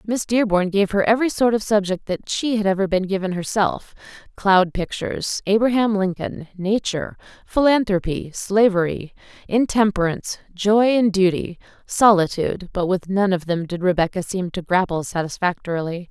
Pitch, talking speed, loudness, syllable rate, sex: 195 Hz, 140 wpm, -20 LUFS, 5.1 syllables/s, female